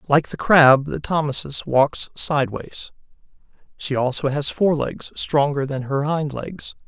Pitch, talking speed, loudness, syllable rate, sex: 145 Hz, 140 wpm, -20 LUFS, 4.2 syllables/s, male